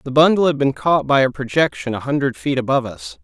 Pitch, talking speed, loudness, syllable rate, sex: 140 Hz, 240 wpm, -18 LUFS, 6.2 syllables/s, male